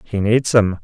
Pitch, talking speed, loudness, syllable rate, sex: 105 Hz, 215 wpm, -16 LUFS, 4.1 syllables/s, male